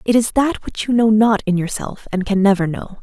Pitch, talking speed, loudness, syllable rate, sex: 210 Hz, 260 wpm, -17 LUFS, 5.3 syllables/s, female